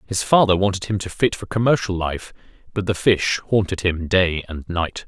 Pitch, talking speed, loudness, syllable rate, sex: 95 Hz, 200 wpm, -20 LUFS, 4.9 syllables/s, male